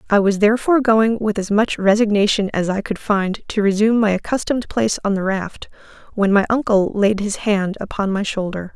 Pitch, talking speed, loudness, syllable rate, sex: 205 Hz, 200 wpm, -18 LUFS, 5.6 syllables/s, female